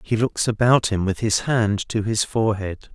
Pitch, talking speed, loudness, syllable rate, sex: 110 Hz, 205 wpm, -21 LUFS, 4.6 syllables/s, male